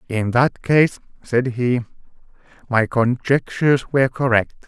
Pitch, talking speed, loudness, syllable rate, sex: 125 Hz, 115 wpm, -19 LUFS, 4.2 syllables/s, male